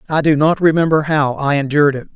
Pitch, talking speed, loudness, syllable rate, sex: 150 Hz, 220 wpm, -15 LUFS, 6.3 syllables/s, male